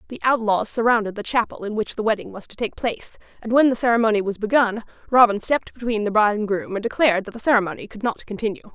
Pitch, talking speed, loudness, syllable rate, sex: 220 Hz, 235 wpm, -21 LUFS, 6.8 syllables/s, female